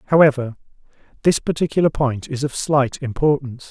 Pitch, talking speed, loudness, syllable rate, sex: 140 Hz, 130 wpm, -19 LUFS, 5.7 syllables/s, male